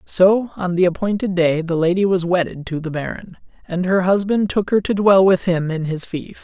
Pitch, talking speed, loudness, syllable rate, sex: 180 Hz, 225 wpm, -18 LUFS, 5.0 syllables/s, male